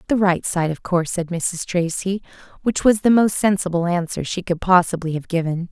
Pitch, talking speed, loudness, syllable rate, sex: 180 Hz, 200 wpm, -20 LUFS, 5.3 syllables/s, female